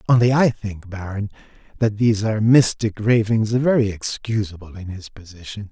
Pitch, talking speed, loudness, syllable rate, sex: 105 Hz, 145 wpm, -19 LUFS, 5.2 syllables/s, male